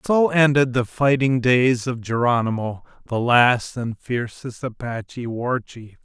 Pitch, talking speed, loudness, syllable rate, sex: 125 Hz, 140 wpm, -20 LUFS, 3.9 syllables/s, male